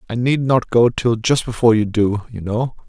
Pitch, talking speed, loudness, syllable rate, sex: 115 Hz, 230 wpm, -17 LUFS, 5.1 syllables/s, male